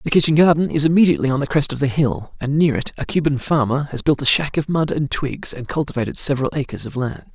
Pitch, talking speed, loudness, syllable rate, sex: 145 Hz, 255 wpm, -19 LUFS, 6.3 syllables/s, male